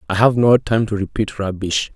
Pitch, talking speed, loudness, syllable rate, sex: 105 Hz, 215 wpm, -18 LUFS, 5.1 syllables/s, male